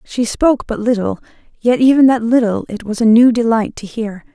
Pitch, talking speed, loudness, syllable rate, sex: 230 Hz, 205 wpm, -14 LUFS, 5.2 syllables/s, female